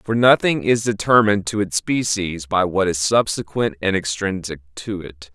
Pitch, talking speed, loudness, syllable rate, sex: 100 Hz, 170 wpm, -19 LUFS, 4.7 syllables/s, male